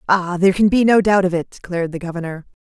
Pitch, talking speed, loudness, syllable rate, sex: 185 Hz, 250 wpm, -17 LUFS, 6.9 syllables/s, female